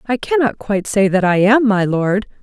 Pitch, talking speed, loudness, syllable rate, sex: 210 Hz, 225 wpm, -15 LUFS, 5.0 syllables/s, female